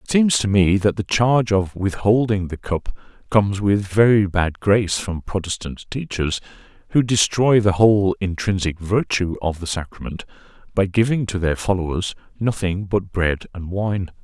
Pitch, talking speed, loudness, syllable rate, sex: 100 Hz, 160 wpm, -20 LUFS, 4.8 syllables/s, male